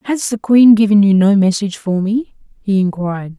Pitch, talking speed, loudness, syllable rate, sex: 205 Hz, 195 wpm, -13 LUFS, 5.4 syllables/s, female